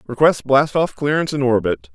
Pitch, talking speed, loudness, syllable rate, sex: 135 Hz, 185 wpm, -18 LUFS, 5.6 syllables/s, male